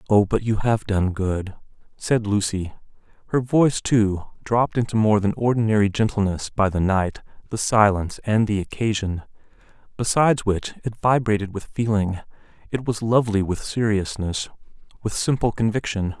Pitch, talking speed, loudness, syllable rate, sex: 105 Hz, 145 wpm, -22 LUFS, 5.0 syllables/s, male